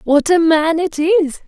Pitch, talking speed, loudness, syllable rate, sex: 330 Hz, 205 wpm, -14 LUFS, 3.7 syllables/s, female